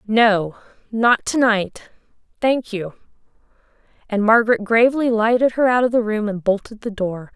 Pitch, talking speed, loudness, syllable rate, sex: 220 Hz, 155 wpm, -18 LUFS, 4.8 syllables/s, female